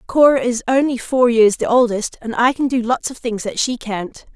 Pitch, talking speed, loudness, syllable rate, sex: 240 Hz, 235 wpm, -17 LUFS, 4.9 syllables/s, female